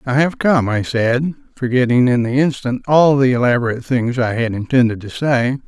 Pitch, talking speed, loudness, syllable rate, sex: 125 Hz, 180 wpm, -16 LUFS, 5.2 syllables/s, male